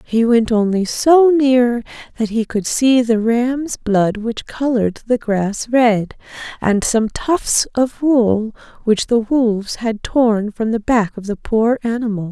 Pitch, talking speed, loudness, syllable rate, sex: 230 Hz, 165 wpm, -16 LUFS, 3.7 syllables/s, female